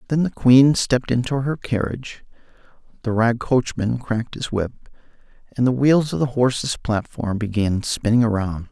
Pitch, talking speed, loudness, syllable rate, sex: 120 Hz, 160 wpm, -20 LUFS, 5.0 syllables/s, male